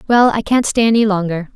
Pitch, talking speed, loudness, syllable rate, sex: 215 Hz, 230 wpm, -14 LUFS, 5.9 syllables/s, female